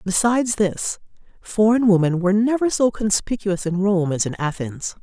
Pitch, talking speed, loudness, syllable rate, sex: 200 Hz, 155 wpm, -20 LUFS, 4.9 syllables/s, female